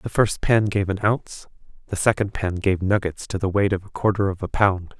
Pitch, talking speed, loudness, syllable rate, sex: 100 Hz, 240 wpm, -22 LUFS, 5.4 syllables/s, male